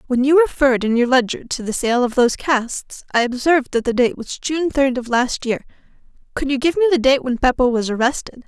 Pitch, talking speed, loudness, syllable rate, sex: 255 Hz, 235 wpm, -18 LUFS, 5.7 syllables/s, female